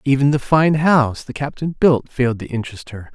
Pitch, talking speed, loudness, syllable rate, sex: 135 Hz, 210 wpm, -17 LUFS, 5.7 syllables/s, male